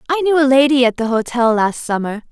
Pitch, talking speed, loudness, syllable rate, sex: 245 Hz, 235 wpm, -15 LUFS, 5.9 syllables/s, female